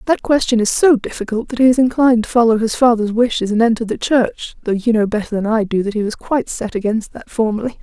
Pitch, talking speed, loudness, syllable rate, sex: 230 Hz, 255 wpm, -16 LUFS, 6.2 syllables/s, female